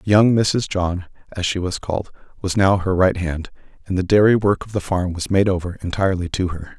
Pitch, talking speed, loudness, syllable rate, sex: 95 Hz, 220 wpm, -20 LUFS, 5.4 syllables/s, male